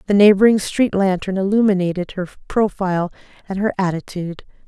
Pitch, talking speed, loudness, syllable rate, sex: 195 Hz, 130 wpm, -18 LUFS, 5.9 syllables/s, female